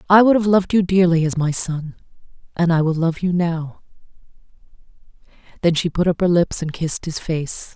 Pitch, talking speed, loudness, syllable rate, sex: 170 Hz, 195 wpm, -19 LUFS, 5.4 syllables/s, female